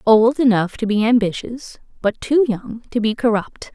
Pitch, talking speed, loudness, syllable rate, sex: 225 Hz, 175 wpm, -18 LUFS, 4.5 syllables/s, female